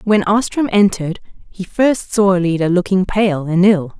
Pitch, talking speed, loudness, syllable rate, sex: 190 Hz, 165 wpm, -15 LUFS, 4.8 syllables/s, female